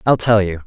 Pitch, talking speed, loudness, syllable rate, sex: 100 Hz, 270 wpm, -15 LUFS, 5.6 syllables/s, male